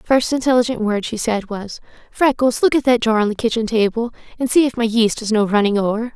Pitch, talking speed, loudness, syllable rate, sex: 230 Hz, 245 wpm, -18 LUFS, 5.9 syllables/s, female